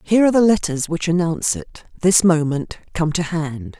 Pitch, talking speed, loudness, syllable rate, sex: 170 Hz, 190 wpm, -18 LUFS, 5.4 syllables/s, female